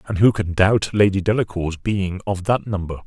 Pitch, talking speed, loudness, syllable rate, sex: 100 Hz, 195 wpm, -20 LUFS, 5.1 syllables/s, male